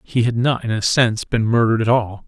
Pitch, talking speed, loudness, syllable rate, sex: 115 Hz, 265 wpm, -18 LUFS, 6.0 syllables/s, male